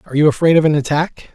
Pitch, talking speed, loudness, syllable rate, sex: 150 Hz, 265 wpm, -15 LUFS, 7.6 syllables/s, male